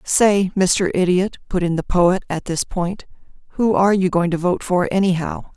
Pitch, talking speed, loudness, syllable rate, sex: 185 Hz, 195 wpm, -18 LUFS, 4.7 syllables/s, female